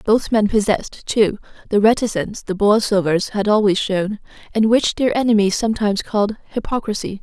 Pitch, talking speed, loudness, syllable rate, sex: 210 Hz, 150 wpm, -18 LUFS, 5.5 syllables/s, female